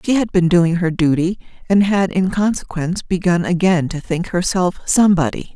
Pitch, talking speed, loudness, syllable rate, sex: 180 Hz, 175 wpm, -17 LUFS, 5.1 syllables/s, female